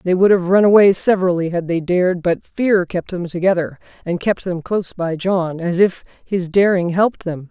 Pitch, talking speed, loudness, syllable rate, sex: 180 Hz, 210 wpm, -17 LUFS, 5.1 syllables/s, female